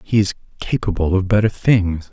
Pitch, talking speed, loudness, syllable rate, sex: 100 Hz, 170 wpm, -18 LUFS, 5.1 syllables/s, male